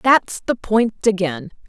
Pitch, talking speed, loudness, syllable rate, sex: 200 Hz, 145 wpm, -19 LUFS, 3.9 syllables/s, female